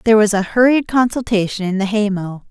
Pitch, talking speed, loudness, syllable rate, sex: 210 Hz, 215 wpm, -16 LUFS, 5.9 syllables/s, female